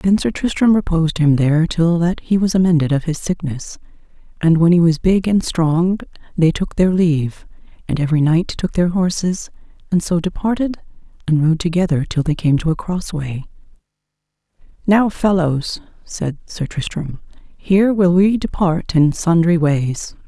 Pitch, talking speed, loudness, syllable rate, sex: 170 Hz, 165 wpm, -17 LUFS, 4.7 syllables/s, female